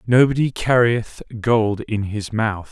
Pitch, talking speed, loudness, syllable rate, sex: 115 Hz, 135 wpm, -19 LUFS, 3.8 syllables/s, male